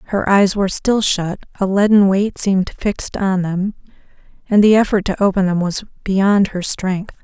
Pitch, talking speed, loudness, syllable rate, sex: 195 Hz, 180 wpm, -16 LUFS, 4.8 syllables/s, female